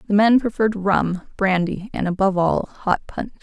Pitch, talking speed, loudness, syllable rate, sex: 200 Hz, 175 wpm, -20 LUFS, 5.1 syllables/s, female